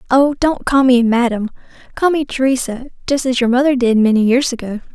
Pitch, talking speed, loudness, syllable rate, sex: 255 Hz, 195 wpm, -15 LUFS, 5.9 syllables/s, female